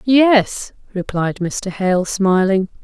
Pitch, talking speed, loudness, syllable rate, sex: 200 Hz, 105 wpm, -17 LUFS, 2.9 syllables/s, female